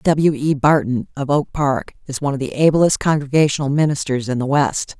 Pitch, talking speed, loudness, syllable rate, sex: 145 Hz, 190 wpm, -18 LUFS, 5.3 syllables/s, female